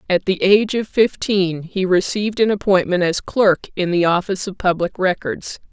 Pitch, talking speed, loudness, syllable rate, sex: 190 Hz, 180 wpm, -18 LUFS, 5.0 syllables/s, female